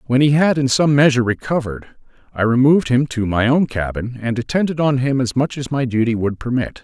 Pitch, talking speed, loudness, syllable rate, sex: 130 Hz, 220 wpm, -17 LUFS, 5.9 syllables/s, male